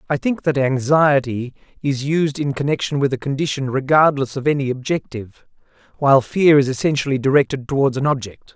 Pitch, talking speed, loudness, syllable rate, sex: 140 Hz, 160 wpm, -18 LUFS, 5.7 syllables/s, male